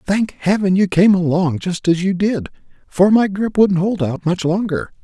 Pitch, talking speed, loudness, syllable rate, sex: 185 Hz, 200 wpm, -16 LUFS, 4.8 syllables/s, male